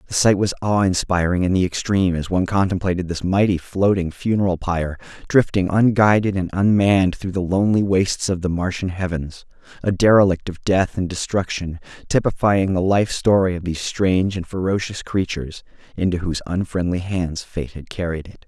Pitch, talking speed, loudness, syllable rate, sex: 95 Hz, 170 wpm, -20 LUFS, 5.5 syllables/s, male